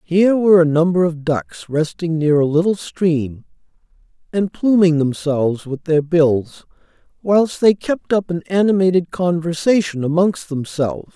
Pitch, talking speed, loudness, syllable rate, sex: 170 Hz, 140 wpm, -17 LUFS, 4.5 syllables/s, male